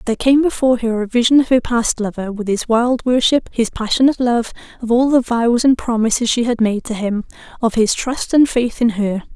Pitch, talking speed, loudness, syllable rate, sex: 235 Hz, 225 wpm, -16 LUFS, 5.4 syllables/s, female